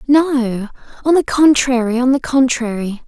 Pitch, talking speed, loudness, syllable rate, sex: 255 Hz, 135 wpm, -15 LUFS, 4.3 syllables/s, female